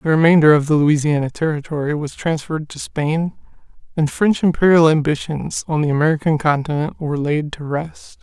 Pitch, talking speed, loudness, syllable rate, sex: 155 Hz, 160 wpm, -18 LUFS, 5.4 syllables/s, male